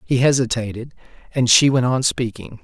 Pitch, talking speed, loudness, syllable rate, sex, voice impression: 125 Hz, 135 wpm, -18 LUFS, 5.2 syllables/s, male, masculine, very adult-like, slightly intellectual, slightly refreshing